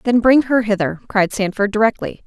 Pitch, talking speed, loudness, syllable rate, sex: 215 Hz, 185 wpm, -16 LUFS, 5.3 syllables/s, female